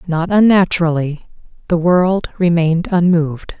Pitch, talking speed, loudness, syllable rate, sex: 170 Hz, 100 wpm, -15 LUFS, 4.7 syllables/s, female